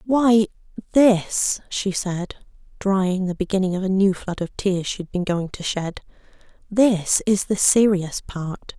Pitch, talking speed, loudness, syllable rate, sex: 195 Hz, 165 wpm, -21 LUFS, 4.0 syllables/s, female